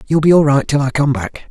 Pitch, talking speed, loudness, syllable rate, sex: 140 Hz, 320 wpm, -14 LUFS, 7.1 syllables/s, male